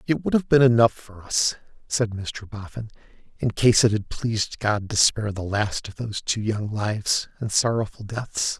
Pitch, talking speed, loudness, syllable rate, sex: 110 Hz, 195 wpm, -23 LUFS, 4.8 syllables/s, male